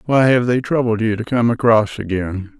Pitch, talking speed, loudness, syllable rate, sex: 115 Hz, 210 wpm, -17 LUFS, 4.9 syllables/s, male